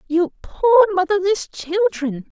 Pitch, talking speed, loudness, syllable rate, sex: 340 Hz, 100 wpm, -18 LUFS, 4.2 syllables/s, female